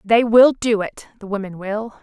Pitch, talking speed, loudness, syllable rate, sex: 215 Hz, 175 wpm, -18 LUFS, 4.4 syllables/s, female